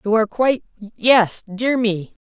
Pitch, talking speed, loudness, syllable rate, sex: 220 Hz, 110 wpm, -18 LUFS, 4.8 syllables/s, female